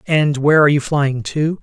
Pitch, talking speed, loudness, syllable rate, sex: 145 Hz, 220 wpm, -15 LUFS, 5.3 syllables/s, male